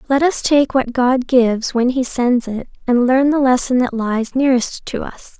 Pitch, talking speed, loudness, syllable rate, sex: 255 Hz, 210 wpm, -16 LUFS, 4.6 syllables/s, female